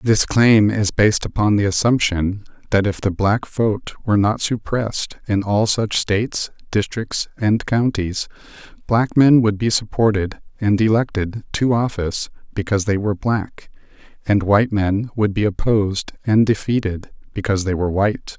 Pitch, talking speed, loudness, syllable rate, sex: 105 Hz, 155 wpm, -19 LUFS, 4.8 syllables/s, male